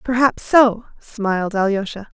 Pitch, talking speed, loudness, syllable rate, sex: 220 Hz, 110 wpm, -17 LUFS, 4.2 syllables/s, female